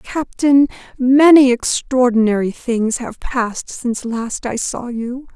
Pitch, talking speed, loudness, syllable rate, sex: 250 Hz, 125 wpm, -16 LUFS, 3.8 syllables/s, female